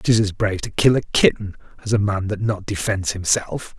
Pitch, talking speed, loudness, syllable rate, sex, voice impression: 100 Hz, 220 wpm, -20 LUFS, 5.4 syllables/s, male, very masculine, very adult-like, very middle-aged, thick, relaxed, weak, dark, soft, slightly muffled, slightly fluent, slightly cool, intellectual, slightly refreshing, sincere, very calm, slightly mature, friendly, reassuring, slightly unique, elegant, sweet, very kind, modest